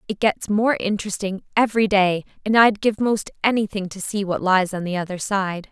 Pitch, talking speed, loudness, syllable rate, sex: 200 Hz, 200 wpm, -21 LUFS, 5.3 syllables/s, female